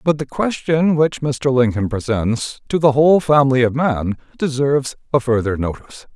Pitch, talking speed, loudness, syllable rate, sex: 135 Hz, 165 wpm, -17 LUFS, 5.1 syllables/s, male